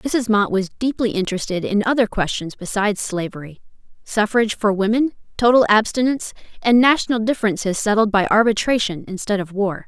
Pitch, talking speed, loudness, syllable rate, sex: 215 Hz, 140 wpm, -19 LUFS, 5.8 syllables/s, female